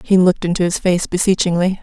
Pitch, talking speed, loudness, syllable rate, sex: 180 Hz, 195 wpm, -16 LUFS, 6.4 syllables/s, female